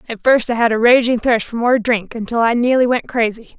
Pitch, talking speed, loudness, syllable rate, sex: 235 Hz, 250 wpm, -15 LUFS, 5.6 syllables/s, female